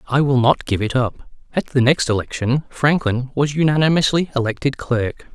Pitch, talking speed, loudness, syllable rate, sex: 135 Hz, 170 wpm, -19 LUFS, 4.9 syllables/s, male